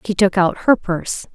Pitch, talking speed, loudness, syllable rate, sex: 190 Hz, 225 wpm, -17 LUFS, 5.0 syllables/s, female